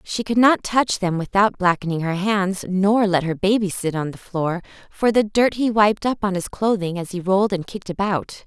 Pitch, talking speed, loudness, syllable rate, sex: 195 Hz, 225 wpm, -20 LUFS, 5.0 syllables/s, female